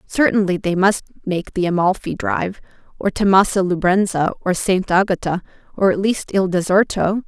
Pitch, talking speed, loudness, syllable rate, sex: 190 Hz, 155 wpm, -18 LUFS, 5.1 syllables/s, female